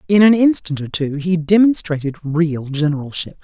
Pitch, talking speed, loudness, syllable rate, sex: 165 Hz, 155 wpm, -17 LUFS, 4.9 syllables/s, female